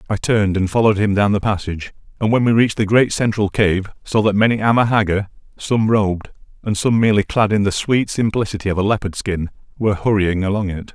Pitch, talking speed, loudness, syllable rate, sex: 105 Hz, 210 wpm, -17 LUFS, 6.2 syllables/s, male